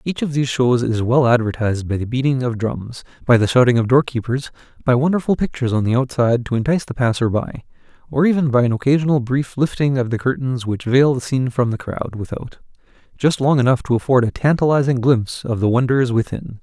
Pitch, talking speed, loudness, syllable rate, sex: 125 Hz, 210 wpm, -18 LUFS, 6.1 syllables/s, male